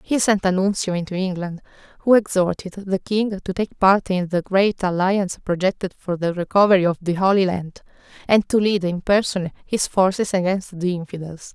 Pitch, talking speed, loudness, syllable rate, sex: 190 Hz, 180 wpm, -20 LUFS, 5.1 syllables/s, female